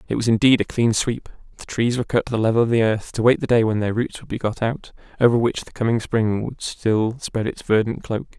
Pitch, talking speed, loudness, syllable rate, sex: 115 Hz, 270 wpm, -21 LUFS, 5.8 syllables/s, male